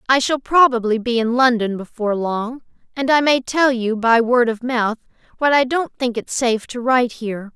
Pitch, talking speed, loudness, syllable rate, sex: 240 Hz, 200 wpm, -18 LUFS, 5.1 syllables/s, female